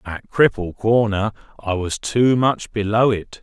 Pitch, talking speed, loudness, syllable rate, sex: 110 Hz, 160 wpm, -19 LUFS, 4.1 syllables/s, male